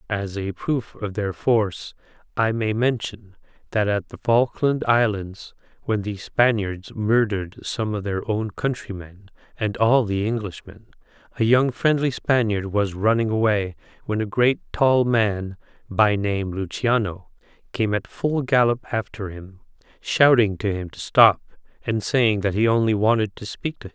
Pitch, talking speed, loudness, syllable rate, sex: 110 Hz, 160 wpm, -22 LUFS, 4.2 syllables/s, male